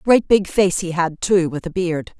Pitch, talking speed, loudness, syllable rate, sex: 180 Hz, 245 wpm, -18 LUFS, 4.3 syllables/s, female